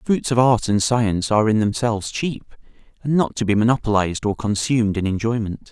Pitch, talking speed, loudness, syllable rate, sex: 110 Hz, 200 wpm, -20 LUFS, 6.1 syllables/s, male